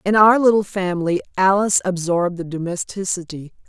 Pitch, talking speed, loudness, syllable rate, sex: 185 Hz, 130 wpm, -18 LUFS, 5.8 syllables/s, female